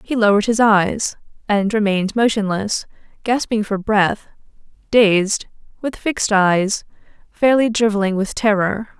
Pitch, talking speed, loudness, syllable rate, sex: 210 Hz, 115 wpm, -17 LUFS, 4.4 syllables/s, female